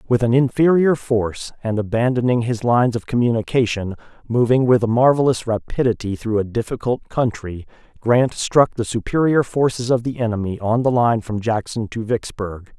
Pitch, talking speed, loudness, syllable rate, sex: 115 Hz, 160 wpm, -19 LUFS, 5.2 syllables/s, male